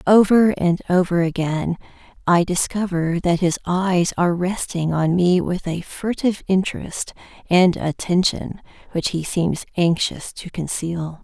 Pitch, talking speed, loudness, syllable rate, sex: 175 Hz, 135 wpm, -20 LUFS, 4.2 syllables/s, female